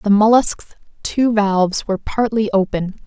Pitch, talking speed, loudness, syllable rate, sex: 210 Hz, 135 wpm, -17 LUFS, 4.5 syllables/s, female